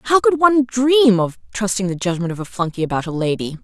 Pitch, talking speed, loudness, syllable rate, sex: 215 Hz, 230 wpm, -18 LUFS, 5.9 syllables/s, female